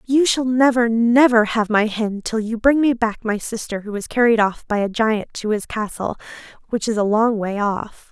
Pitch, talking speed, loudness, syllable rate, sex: 225 Hz, 220 wpm, -19 LUFS, 4.7 syllables/s, female